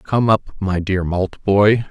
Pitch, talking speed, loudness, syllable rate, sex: 100 Hz, 155 wpm, -18 LUFS, 3.2 syllables/s, male